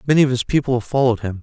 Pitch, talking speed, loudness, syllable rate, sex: 125 Hz, 295 wpm, -18 LUFS, 8.5 syllables/s, male